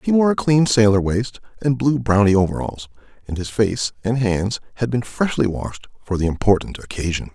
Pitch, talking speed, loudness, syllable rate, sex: 110 Hz, 190 wpm, -19 LUFS, 5.2 syllables/s, male